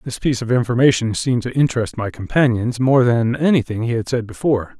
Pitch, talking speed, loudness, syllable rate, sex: 120 Hz, 200 wpm, -18 LUFS, 6.2 syllables/s, male